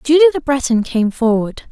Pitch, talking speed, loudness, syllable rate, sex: 260 Hz, 175 wpm, -15 LUFS, 5.4 syllables/s, female